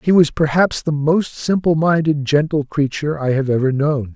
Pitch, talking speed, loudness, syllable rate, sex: 150 Hz, 190 wpm, -17 LUFS, 4.9 syllables/s, male